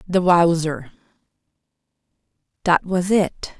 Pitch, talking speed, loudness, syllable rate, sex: 175 Hz, 85 wpm, -19 LUFS, 3.8 syllables/s, female